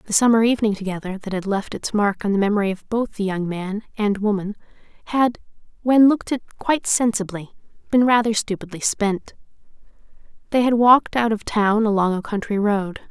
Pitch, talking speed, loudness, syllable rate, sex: 210 Hz, 180 wpm, -20 LUFS, 5.5 syllables/s, female